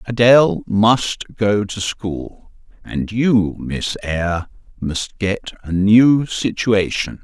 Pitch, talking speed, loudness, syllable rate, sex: 105 Hz, 115 wpm, -17 LUFS, 3.1 syllables/s, male